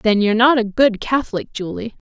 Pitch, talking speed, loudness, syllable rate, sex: 225 Hz, 200 wpm, -17 LUFS, 5.7 syllables/s, female